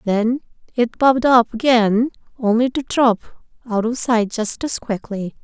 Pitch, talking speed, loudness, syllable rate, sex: 235 Hz, 155 wpm, -18 LUFS, 4.4 syllables/s, female